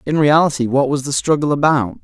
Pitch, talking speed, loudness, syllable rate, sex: 140 Hz, 205 wpm, -16 LUFS, 5.9 syllables/s, male